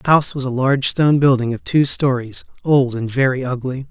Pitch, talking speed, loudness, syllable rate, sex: 130 Hz, 215 wpm, -17 LUFS, 5.9 syllables/s, male